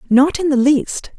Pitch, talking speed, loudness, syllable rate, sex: 280 Hz, 205 wpm, -15 LUFS, 4.3 syllables/s, female